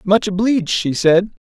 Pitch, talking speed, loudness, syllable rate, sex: 195 Hz, 160 wpm, -16 LUFS, 4.8 syllables/s, male